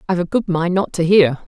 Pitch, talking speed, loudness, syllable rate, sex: 180 Hz, 270 wpm, -17 LUFS, 6.1 syllables/s, female